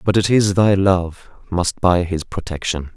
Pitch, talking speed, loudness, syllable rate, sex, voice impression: 90 Hz, 180 wpm, -18 LUFS, 4.1 syllables/s, male, very masculine, very adult-like, thick, tensed, very powerful, slightly dark, soft, slightly muffled, fluent, slightly raspy, cool, intellectual, refreshing, slightly sincere, very calm, mature, very friendly, very reassuring, very unique, slightly elegant, wild, sweet, slightly lively, kind, modest